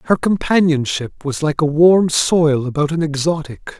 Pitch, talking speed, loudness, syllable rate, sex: 155 Hz, 160 wpm, -16 LUFS, 4.5 syllables/s, male